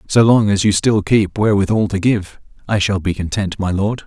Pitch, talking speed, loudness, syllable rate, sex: 100 Hz, 220 wpm, -16 LUFS, 5.2 syllables/s, male